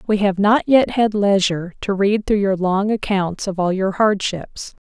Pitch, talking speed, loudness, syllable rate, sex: 200 Hz, 195 wpm, -18 LUFS, 4.4 syllables/s, female